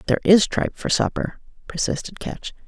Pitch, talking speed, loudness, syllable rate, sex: 200 Hz, 155 wpm, -21 LUFS, 6.0 syllables/s, female